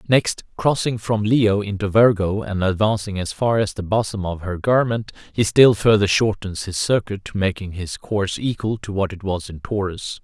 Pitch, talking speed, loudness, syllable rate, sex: 100 Hz, 190 wpm, -20 LUFS, 4.7 syllables/s, male